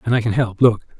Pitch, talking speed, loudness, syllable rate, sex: 110 Hz, 240 wpm, -17 LUFS, 6.7 syllables/s, male